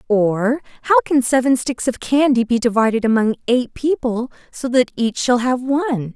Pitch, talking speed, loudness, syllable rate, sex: 245 Hz, 175 wpm, -18 LUFS, 4.7 syllables/s, female